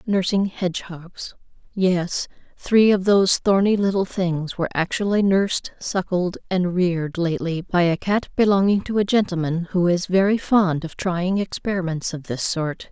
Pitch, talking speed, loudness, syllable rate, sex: 185 Hz, 150 wpm, -21 LUFS, 4.7 syllables/s, female